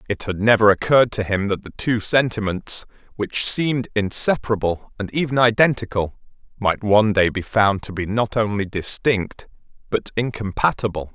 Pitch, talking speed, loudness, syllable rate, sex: 110 Hz, 150 wpm, -20 LUFS, 5.1 syllables/s, male